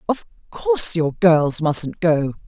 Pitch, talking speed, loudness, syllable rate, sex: 175 Hz, 145 wpm, -19 LUFS, 3.6 syllables/s, female